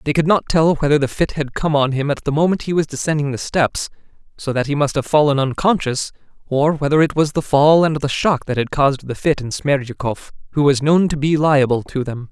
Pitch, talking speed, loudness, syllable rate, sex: 145 Hz, 245 wpm, -17 LUFS, 5.6 syllables/s, male